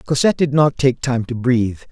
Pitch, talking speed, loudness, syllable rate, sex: 130 Hz, 220 wpm, -17 LUFS, 5.9 syllables/s, male